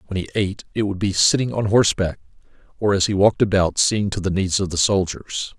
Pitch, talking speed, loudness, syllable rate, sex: 100 Hz, 225 wpm, -20 LUFS, 6.0 syllables/s, male